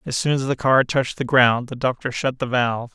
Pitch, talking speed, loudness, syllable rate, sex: 130 Hz, 265 wpm, -20 LUFS, 5.7 syllables/s, male